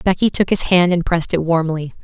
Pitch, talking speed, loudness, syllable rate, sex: 175 Hz, 235 wpm, -16 LUFS, 5.9 syllables/s, female